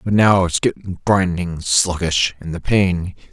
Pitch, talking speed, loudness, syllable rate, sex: 90 Hz, 165 wpm, -18 LUFS, 4.0 syllables/s, male